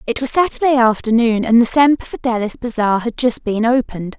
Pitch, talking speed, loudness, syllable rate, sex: 235 Hz, 185 wpm, -15 LUFS, 5.7 syllables/s, female